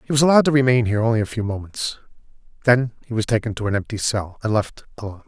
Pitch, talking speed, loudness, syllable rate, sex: 115 Hz, 240 wpm, -20 LUFS, 7.5 syllables/s, male